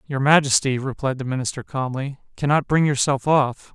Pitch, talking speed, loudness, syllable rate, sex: 135 Hz, 160 wpm, -21 LUFS, 5.2 syllables/s, male